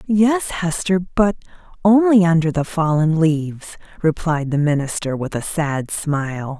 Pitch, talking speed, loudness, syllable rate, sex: 165 Hz, 135 wpm, -18 LUFS, 4.2 syllables/s, female